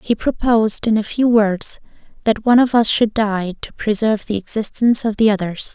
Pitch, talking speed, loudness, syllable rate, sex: 215 Hz, 200 wpm, -17 LUFS, 5.5 syllables/s, female